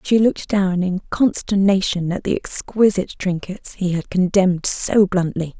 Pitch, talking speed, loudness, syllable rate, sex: 190 Hz, 150 wpm, -19 LUFS, 4.7 syllables/s, female